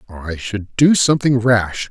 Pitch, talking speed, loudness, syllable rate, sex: 115 Hz, 155 wpm, -16 LUFS, 4.1 syllables/s, male